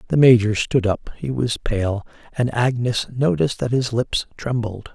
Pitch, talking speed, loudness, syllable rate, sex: 120 Hz, 170 wpm, -20 LUFS, 4.4 syllables/s, male